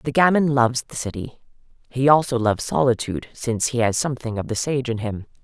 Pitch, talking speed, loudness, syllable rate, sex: 125 Hz, 200 wpm, -21 LUFS, 6.1 syllables/s, female